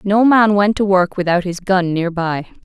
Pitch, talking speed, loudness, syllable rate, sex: 190 Hz, 225 wpm, -15 LUFS, 4.5 syllables/s, female